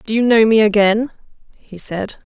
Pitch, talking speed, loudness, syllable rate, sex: 215 Hz, 180 wpm, -15 LUFS, 4.8 syllables/s, female